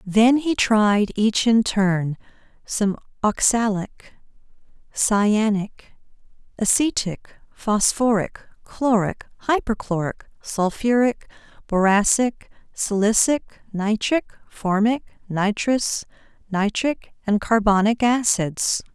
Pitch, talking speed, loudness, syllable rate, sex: 215 Hz, 75 wpm, -21 LUFS, 3.5 syllables/s, female